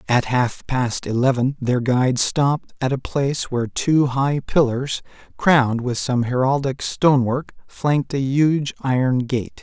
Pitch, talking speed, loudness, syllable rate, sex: 130 Hz, 150 wpm, -20 LUFS, 4.3 syllables/s, male